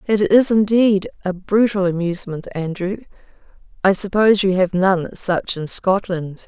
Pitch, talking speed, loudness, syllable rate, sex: 190 Hz, 140 wpm, -18 LUFS, 4.5 syllables/s, female